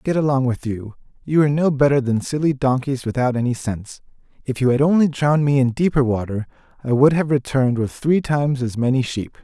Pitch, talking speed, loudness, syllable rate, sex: 135 Hz, 205 wpm, -19 LUFS, 6.0 syllables/s, male